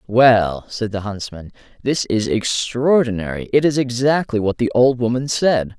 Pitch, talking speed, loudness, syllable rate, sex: 120 Hz, 155 wpm, -18 LUFS, 4.4 syllables/s, male